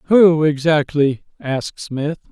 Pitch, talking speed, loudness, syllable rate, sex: 150 Hz, 105 wpm, -17 LUFS, 3.8 syllables/s, male